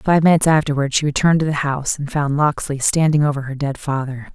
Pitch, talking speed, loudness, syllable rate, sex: 145 Hz, 220 wpm, -18 LUFS, 6.3 syllables/s, female